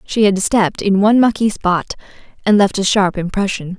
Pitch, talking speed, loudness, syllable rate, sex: 200 Hz, 190 wpm, -15 LUFS, 5.5 syllables/s, female